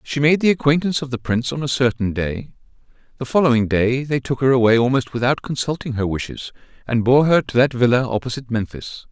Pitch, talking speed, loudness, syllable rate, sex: 130 Hz, 205 wpm, -19 LUFS, 6.1 syllables/s, male